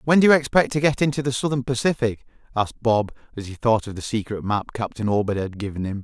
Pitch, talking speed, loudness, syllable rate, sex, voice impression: 120 Hz, 240 wpm, -22 LUFS, 6.5 syllables/s, male, masculine, adult-like, slightly thick, slightly cool, slightly refreshing, sincere